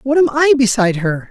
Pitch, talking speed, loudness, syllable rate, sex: 215 Hz, 230 wpm, -14 LUFS, 5.9 syllables/s, male